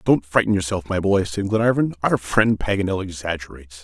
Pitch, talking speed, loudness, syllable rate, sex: 95 Hz, 170 wpm, -21 LUFS, 5.8 syllables/s, male